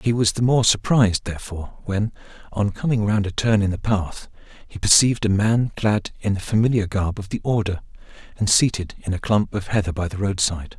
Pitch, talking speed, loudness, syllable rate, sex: 105 Hz, 205 wpm, -21 LUFS, 5.7 syllables/s, male